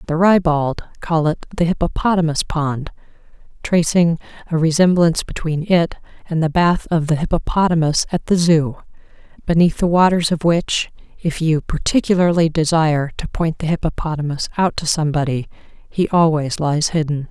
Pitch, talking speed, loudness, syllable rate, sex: 160 Hz, 140 wpm, -18 LUFS, 5.1 syllables/s, female